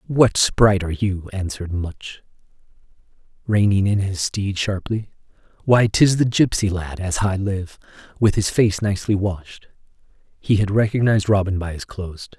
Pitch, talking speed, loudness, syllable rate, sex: 100 Hz, 150 wpm, -20 LUFS, 4.9 syllables/s, male